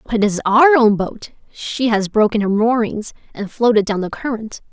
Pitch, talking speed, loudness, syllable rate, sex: 220 Hz, 205 wpm, -16 LUFS, 4.9 syllables/s, female